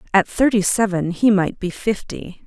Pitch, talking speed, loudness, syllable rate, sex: 200 Hz, 170 wpm, -19 LUFS, 4.5 syllables/s, female